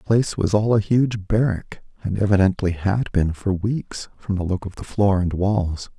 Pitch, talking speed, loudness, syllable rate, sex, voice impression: 100 Hz, 210 wpm, -21 LUFS, 4.8 syllables/s, male, masculine, adult-like, slightly relaxed, slightly weak, soft, muffled, fluent, intellectual, sincere, calm, unique, slightly wild, modest